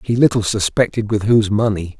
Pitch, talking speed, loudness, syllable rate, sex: 105 Hz, 180 wpm, -16 LUFS, 5.8 syllables/s, male